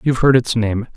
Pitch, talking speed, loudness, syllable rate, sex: 120 Hz, 250 wpm, -16 LUFS, 6.2 syllables/s, male